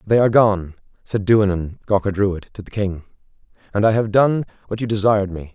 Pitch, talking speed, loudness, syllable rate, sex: 105 Hz, 195 wpm, -19 LUFS, 5.8 syllables/s, male